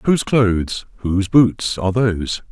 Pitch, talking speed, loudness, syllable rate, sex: 105 Hz, 145 wpm, -18 LUFS, 4.9 syllables/s, male